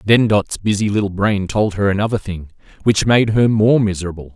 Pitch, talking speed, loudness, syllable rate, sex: 100 Hz, 195 wpm, -16 LUFS, 5.7 syllables/s, male